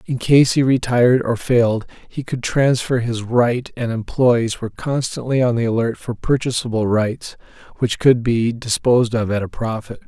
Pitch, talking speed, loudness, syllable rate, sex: 120 Hz, 175 wpm, -18 LUFS, 4.8 syllables/s, male